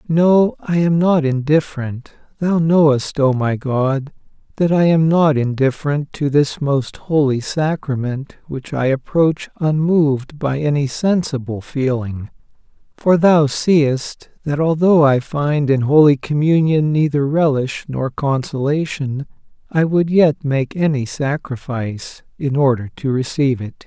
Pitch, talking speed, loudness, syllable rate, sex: 145 Hz, 135 wpm, -17 LUFS, 4.0 syllables/s, male